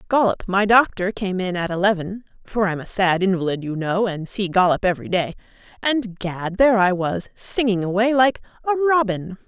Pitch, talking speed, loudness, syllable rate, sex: 200 Hz, 175 wpm, -20 LUFS, 3.5 syllables/s, female